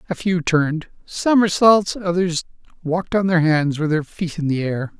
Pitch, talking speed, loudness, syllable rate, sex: 170 Hz, 180 wpm, -19 LUFS, 4.7 syllables/s, male